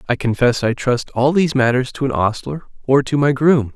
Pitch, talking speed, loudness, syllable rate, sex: 130 Hz, 225 wpm, -17 LUFS, 5.3 syllables/s, male